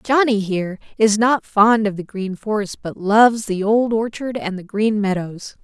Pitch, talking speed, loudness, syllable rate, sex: 210 Hz, 190 wpm, -18 LUFS, 4.6 syllables/s, female